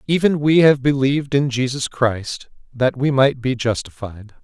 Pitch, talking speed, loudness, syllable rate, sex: 130 Hz, 160 wpm, -18 LUFS, 4.5 syllables/s, male